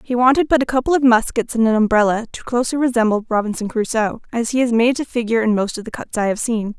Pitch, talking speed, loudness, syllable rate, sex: 230 Hz, 255 wpm, -18 LUFS, 6.6 syllables/s, female